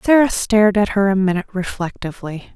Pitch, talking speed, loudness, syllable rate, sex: 200 Hz, 165 wpm, -17 LUFS, 6.3 syllables/s, female